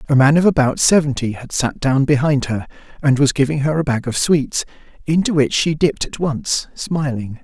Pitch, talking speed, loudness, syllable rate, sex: 140 Hz, 200 wpm, -17 LUFS, 5.1 syllables/s, male